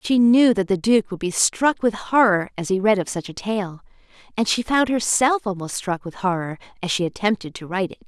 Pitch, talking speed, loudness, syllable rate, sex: 205 Hz, 230 wpm, -21 LUFS, 5.4 syllables/s, female